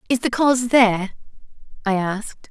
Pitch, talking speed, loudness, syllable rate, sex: 220 Hz, 145 wpm, -19 LUFS, 5.6 syllables/s, female